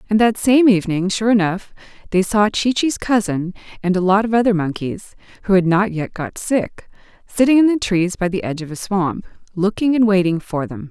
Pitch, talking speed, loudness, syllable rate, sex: 200 Hz, 210 wpm, -17 LUFS, 5.3 syllables/s, female